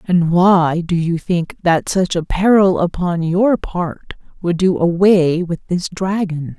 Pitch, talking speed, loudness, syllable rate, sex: 175 Hz, 165 wpm, -16 LUFS, 3.7 syllables/s, female